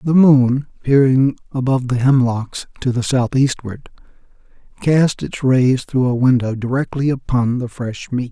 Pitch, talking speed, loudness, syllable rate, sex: 130 Hz, 145 wpm, -17 LUFS, 4.4 syllables/s, male